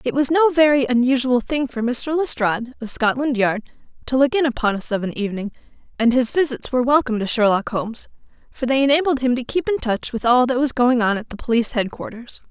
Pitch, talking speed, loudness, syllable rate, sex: 250 Hz, 220 wpm, -19 LUFS, 6.1 syllables/s, female